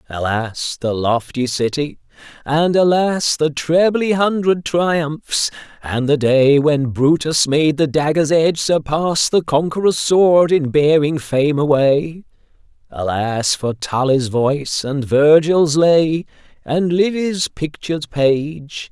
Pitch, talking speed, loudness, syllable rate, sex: 150 Hz, 120 wpm, -16 LUFS, 3.5 syllables/s, male